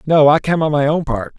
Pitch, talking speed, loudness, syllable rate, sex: 150 Hz, 305 wpm, -15 LUFS, 5.7 syllables/s, male